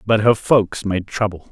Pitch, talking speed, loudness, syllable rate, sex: 100 Hz, 200 wpm, -18 LUFS, 4.3 syllables/s, male